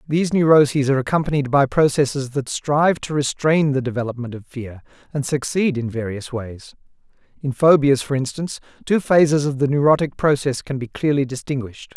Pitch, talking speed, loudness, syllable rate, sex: 140 Hz, 165 wpm, -19 LUFS, 5.7 syllables/s, male